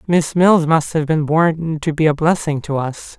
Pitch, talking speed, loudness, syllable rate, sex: 155 Hz, 225 wpm, -16 LUFS, 4.3 syllables/s, male